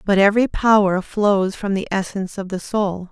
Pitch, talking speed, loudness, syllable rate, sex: 200 Hz, 195 wpm, -19 LUFS, 5.0 syllables/s, female